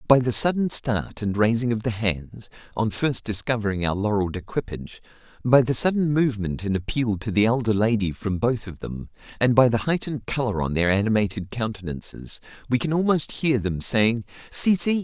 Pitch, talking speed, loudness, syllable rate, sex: 115 Hz, 170 wpm, -23 LUFS, 5.4 syllables/s, male